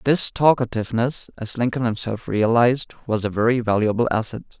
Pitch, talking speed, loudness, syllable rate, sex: 115 Hz, 145 wpm, -21 LUFS, 5.4 syllables/s, male